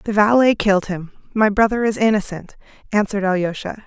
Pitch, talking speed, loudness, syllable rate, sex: 205 Hz, 155 wpm, -18 LUFS, 5.8 syllables/s, female